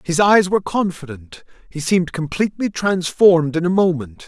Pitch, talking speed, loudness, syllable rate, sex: 175 Hz, 155 wpm, -17 LUFS, 5.4 syllables/s, male